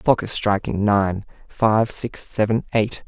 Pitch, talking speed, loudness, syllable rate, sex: 105 Hz, 175 wpm, -21 LUFS, 4.0 syllables/s, male